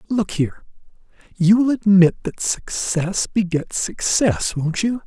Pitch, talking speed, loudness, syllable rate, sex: 190 Hz, 120 wpm, -19 LUFS, 3.6 syllables/s, male